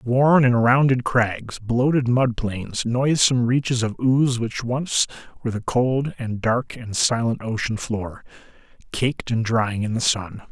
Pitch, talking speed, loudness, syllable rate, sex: 120 Hz, 160 wpm, -21 LUFS, 4.1 syllables/s, male